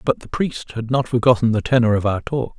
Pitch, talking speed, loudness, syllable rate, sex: 120 Hz, 255 wpm, -19 LUFS, 5.6 syllables/s, male